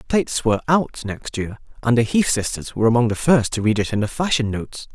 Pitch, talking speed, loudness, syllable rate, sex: 120 Hz, 245 wpm, -20 LUFS, 6.0 syllables/s, male